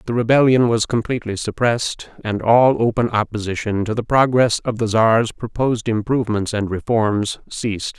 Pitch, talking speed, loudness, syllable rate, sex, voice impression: 115 Hz, 150 wpm, -18 LUFS, 5.1 syllables/s, male, masculine, adult-like, slightly thick, cool, sincere, slightly calm, slightly friendly